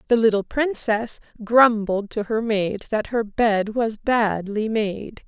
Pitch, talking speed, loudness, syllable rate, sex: 220 Hz, 150 wpm, -21 LUFS, 3.6 syllables/s, female